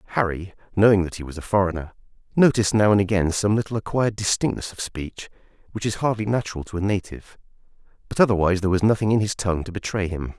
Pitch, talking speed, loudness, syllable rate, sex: 100 Hz, 200 wpm, -22 LUFS, 7.3 syllables/s, male